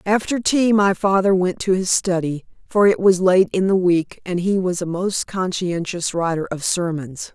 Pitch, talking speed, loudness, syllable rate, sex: 185 Hz, 195 wpm, -19 LUFS, 4.5 syllables/s, female